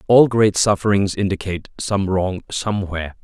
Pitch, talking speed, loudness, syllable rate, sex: 95 Hz, 130 wpm, -19 LUFS, 5.2 syllables/s, male